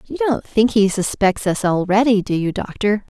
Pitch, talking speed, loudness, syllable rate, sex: 205 Hz, 190 wpm, -18 LUFS, 4.7 syllables/s, female